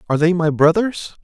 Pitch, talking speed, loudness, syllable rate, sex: 170 Hz, 195 wpm, -16 LUFS, 6.0 syllables/s, male